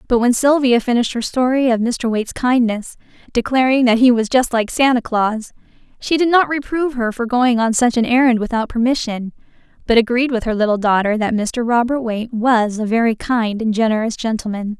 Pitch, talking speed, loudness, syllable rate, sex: 235 Hz, 195 wpm, -16 LUFS, 5.5 syllables/s, female